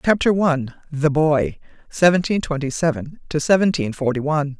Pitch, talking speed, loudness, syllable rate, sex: 155 Hz, 145 wpm, -19 LUFS, 5.3 syllables/s, female